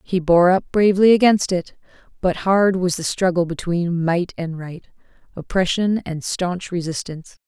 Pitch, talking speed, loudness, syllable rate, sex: 180 Hz, 150 wpm, -19 LUFS, 4.6 syllables/s, female